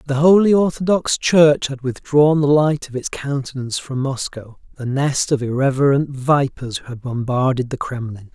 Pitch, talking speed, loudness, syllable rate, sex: 135 Hz, 165 wpm, -18 LUFS, 4.8 syllables/s, male